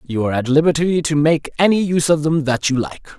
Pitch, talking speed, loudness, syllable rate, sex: 150 Hz, 245 wpm, -17 LUFS, 6.2 syllables/s, male